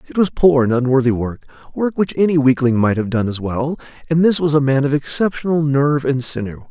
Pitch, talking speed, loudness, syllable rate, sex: 140 Hz, 215 wpm, -17 LUFS, 5.7 syllables/s, male